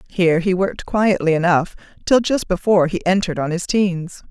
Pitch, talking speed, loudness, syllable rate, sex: 185 Hz, 180 wpm, -18 LUFS, 5.6 syllables/s, female